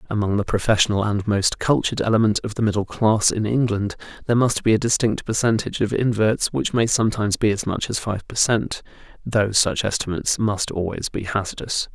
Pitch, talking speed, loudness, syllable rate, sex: 105 Hz, 190 wpm, -21 LUFS, 5.7 syllables/s, male